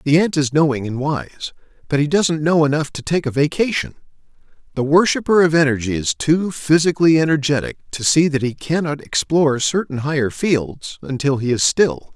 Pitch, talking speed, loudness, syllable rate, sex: 150 Hz, 180 wpm, -18 LUFS, 5.4 syllables/s, male